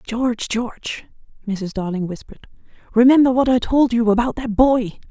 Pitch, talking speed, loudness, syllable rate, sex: 235 Hz, 155 wpm, -18 LUFS, 5.3 syllables/s, female